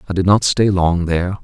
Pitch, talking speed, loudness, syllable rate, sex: 95 Hz, 250 wpm, -15 LUFS, 5.8 syllables/s, male